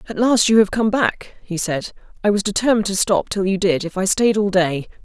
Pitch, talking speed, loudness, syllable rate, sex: 200 Hz, 250 wpm, -18 LUFS, 5.5 syllables/s, female